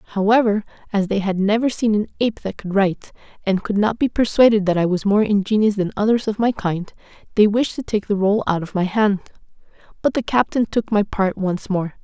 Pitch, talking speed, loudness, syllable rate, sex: 205 Hz, 220 wpm, -19 LUFS, 5.7 syllables/s, female